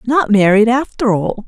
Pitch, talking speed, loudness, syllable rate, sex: 220 Hz, 165 wpm, -13 LUFS, 4.5 syllables/s, female